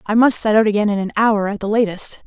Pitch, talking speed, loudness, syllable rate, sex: 210 Hz, 290 wpm, -16 LUFS, 6.2 syllables/s, female